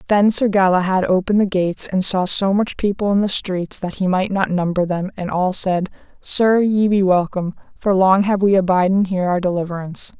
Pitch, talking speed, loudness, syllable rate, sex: 190 Hz, 205 wpm, -18 LUFS, 5.4 syllables/s, female